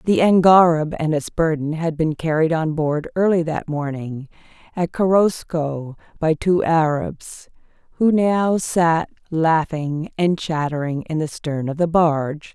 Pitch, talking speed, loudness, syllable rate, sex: 160 Hz, 145 wpm, -19 LUFS, 3.9 syllables/s, female